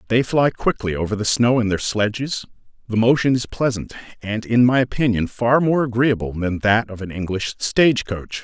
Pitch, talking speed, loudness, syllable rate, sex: 115 Hz, 185 wpm, -19 LUFS, 5.1 syllables/s, male